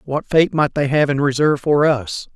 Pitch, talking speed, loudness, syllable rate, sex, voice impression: 145 Hz, 230 wpm, -17 LUFS, 5.1 syllables/s, male, masculine, adult-like, tensed, powerful, bright, clear, fluent, cool, intellectual, slightly refreshing, calm, friendly, reassuring, lively, slightly light